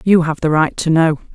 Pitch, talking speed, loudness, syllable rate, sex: 160 Hz, 270 wpm, -15 LUFS, 5.3 syllables/s, female